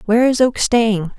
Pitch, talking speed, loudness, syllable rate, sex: 225 Hz, 200 wpm, -15 LUFS, 5.0 syllables/s, female